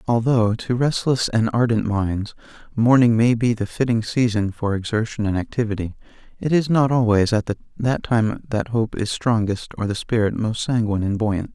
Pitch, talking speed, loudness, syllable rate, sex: 115 Hz, 175 wpm, -20 LUFS, 5.0 syllables/s, male